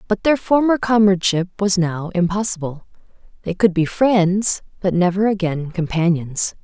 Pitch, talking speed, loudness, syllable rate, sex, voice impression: 190 Hz, 135 wpm, -18 LUFS, 4.6 syllables/s, female, very feminine, slightly adult-like, calm, elegant